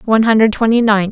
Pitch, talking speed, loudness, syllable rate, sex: 220 Hz, 215 wpm, -12 LUFS, 7.1 syllables/s, female